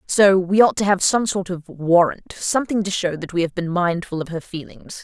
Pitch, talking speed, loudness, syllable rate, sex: 185 Hz, 240 wpm, -19 LUFS, 5.1 syllables/s, female